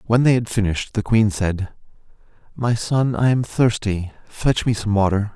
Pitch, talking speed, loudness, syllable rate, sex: 110 Hz, 180 wpm, -20 LUFS, 4.7 syllables/s, male